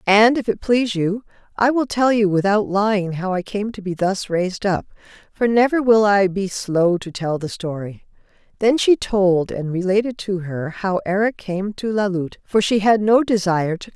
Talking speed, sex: 210 wpm, female